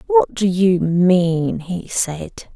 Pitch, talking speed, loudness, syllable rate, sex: 190 Hz, 140 wpm, -17 LUFS, 2.8 syllables/s, female